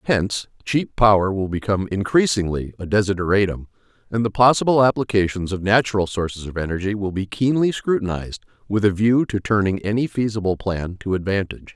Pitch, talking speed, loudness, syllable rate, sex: 105 Hz, 160 wpm, -20 LUFS, 5.9 syllables/s, male